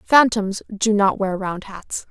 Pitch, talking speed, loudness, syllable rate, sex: 205 Hz, 170 wpm, -20 LUFS, 3.6 syllables/s, female